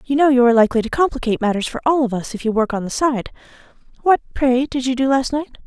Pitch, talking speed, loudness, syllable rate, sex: 255 Hz, 265 wpm, -18 LUFS, 7.1 syllables/s, female